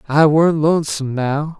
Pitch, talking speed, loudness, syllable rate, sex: 150 Hz, 150 wpm, -16 LUFS, 5.0 syllables/s, male